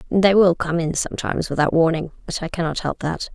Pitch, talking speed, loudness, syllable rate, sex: 170 Hz, 215 wpm, -20 LUFS, 6.0 syllables/s, female